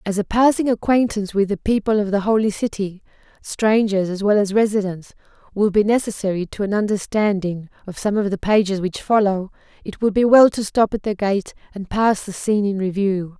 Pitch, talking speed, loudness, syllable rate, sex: 205 Hz, 195 wpm, -19 LUFS, 5.4 syllables/s, female